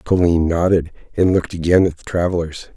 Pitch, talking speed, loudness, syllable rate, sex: 85 Hz, 175 wpm, -17 LUFS, 6.1 syllables/s, male